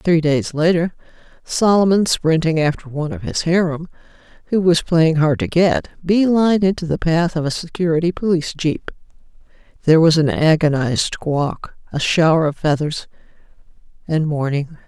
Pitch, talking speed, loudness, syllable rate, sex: 160 Hz, 150 wpm, -17 LUFS, 5.1 syllables/s, female